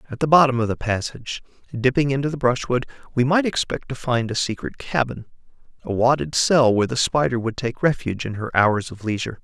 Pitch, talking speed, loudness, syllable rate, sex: 125 Hz, 205 wpm, -21 LUFS, 6.0 syllables/s, male